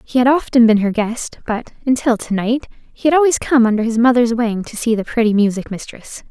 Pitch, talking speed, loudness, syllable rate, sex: 235 Hz, 230 wpm, -16 LUFS, 5.6 syllables/s, female